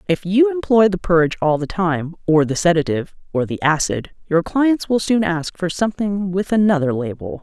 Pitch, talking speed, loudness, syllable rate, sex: 180 Hz, 195 wpm, -18 LUFS, 5.2 syllables/s, female